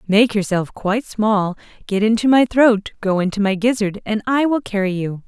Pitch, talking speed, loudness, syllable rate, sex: 210 Hz, 180 wpm, -18 LUFS, 4.9 syllables/s, female